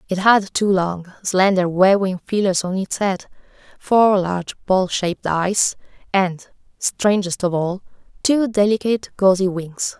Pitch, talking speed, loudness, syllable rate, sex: 190 Hz, 140 wpm, -19 LUFS, 4.0 syllables/s, female